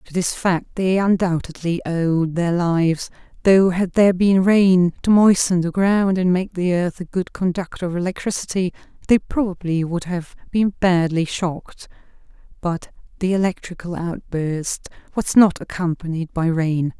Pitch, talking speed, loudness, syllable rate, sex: 180 Hz, 150 wpm, -19 LUFS, 4.5 syllables/s, female